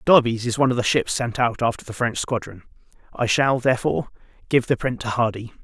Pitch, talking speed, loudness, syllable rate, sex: 120 Hz, 215 wpm, -22 LUFS, 6.1 syllables/s, male